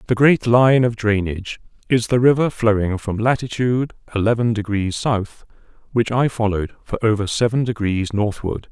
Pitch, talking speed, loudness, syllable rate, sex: 110 Hz, 150 wpm, -19 LUFS, 5.1 syllables/s, male